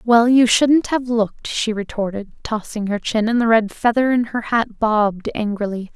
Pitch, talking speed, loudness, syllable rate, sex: 225 Hz, 190 wpm, -18 LUFS, 4.7 syllables/s, female